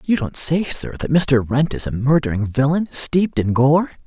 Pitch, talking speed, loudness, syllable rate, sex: 140 Hz, 205 wpm, -18 LUFS, 4.8 syllables/s, male